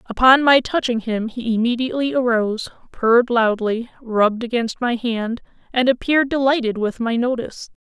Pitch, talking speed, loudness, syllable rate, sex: 240 Hz, 145 wpm, -19 LUFS, 5.3 syllables/s, female